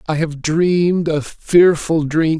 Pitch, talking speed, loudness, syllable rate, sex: 160 Hz, 150 wpm, -16 LUFS, 3.5 syllables/s, male